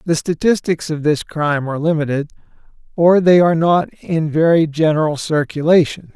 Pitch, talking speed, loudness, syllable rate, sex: 160 Hz, 145 wpm, -16 LUFS, 5.2 syllables/s, male